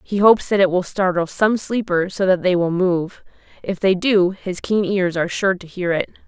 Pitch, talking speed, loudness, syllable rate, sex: 185 Hz, 230 wpm, -19 LUFS, 5.0 syllables/s, female